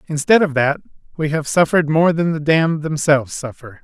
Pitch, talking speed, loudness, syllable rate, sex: 155 Hz, 190 wpm, -17 LUFS, 5.8 syllables/s, male